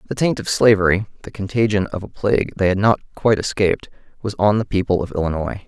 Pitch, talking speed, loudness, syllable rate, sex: 100 Hz, 210 wpm, -19 LUFS, 6.4 syllables/s, male